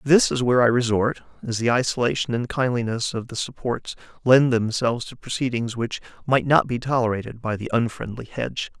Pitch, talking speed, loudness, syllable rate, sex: 120 Hz, 175 wpm, -22 LUFS, 5.6 syllables/s, male